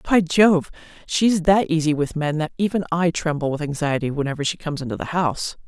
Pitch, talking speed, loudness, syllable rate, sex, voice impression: 160 Hz, 200 wpm, -21 LUFS, 5.9 syllables/s, female, very feminine, slightly middle-aged, slightly thin, slightly tensed, powerful, slightly bright, soft, slightly muffled, fluent, cool, intellectual, very refreshing, sincere, very calm, friendly, reassuring, slightly unique, elegant, slightly wild, sweet, lively, kind, slightly modest